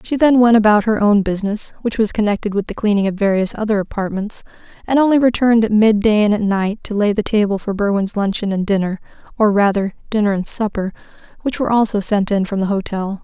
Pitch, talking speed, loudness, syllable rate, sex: 210 Hz, 215 wpm, -16 LUFS, 6.1 syllables/s, female